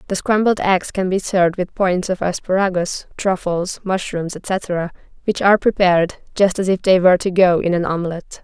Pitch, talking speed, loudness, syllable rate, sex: 185 Hz, 185 wpm, -18 LUFS, 5.1 syllables/s, female